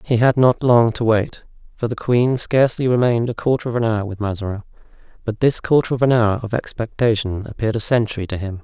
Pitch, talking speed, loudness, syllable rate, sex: 115 Hz, 215 wpm, -19 LUFS, 6.1 syllables/s, male